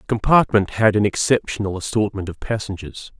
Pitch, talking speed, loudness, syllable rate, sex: 105 Hz, 150 wpm, -19 LUFS, 5.5 syllables/s, male